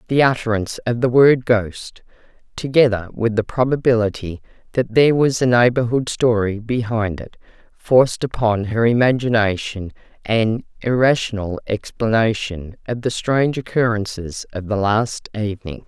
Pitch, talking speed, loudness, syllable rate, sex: 115 Hz, 125 wpm, -18 LUFS, 4.8 syllables/s, female